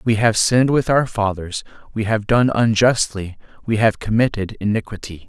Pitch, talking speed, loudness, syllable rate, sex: 110 Hz, 160 wpm, -18 LUFS, 5.1 syllables/s, male